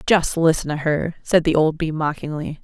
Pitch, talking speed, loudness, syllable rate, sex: 160 Hz, 205 wpm, -20 LUFS, 5.0 syllables/s, female